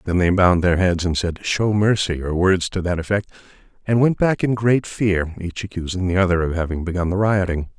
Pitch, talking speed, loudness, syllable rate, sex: 95 Hz, 225 wpm, -20 LUFS, 5.5 syllables/s, male